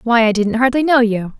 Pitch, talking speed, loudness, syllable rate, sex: 235 Hz, 260 wpm, -14 LUFS, 5.5 syllables/s, female